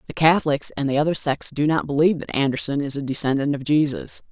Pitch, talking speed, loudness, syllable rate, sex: 145 Hz, 220 wpm, -21 LUFS, 6.5 syllables/s, female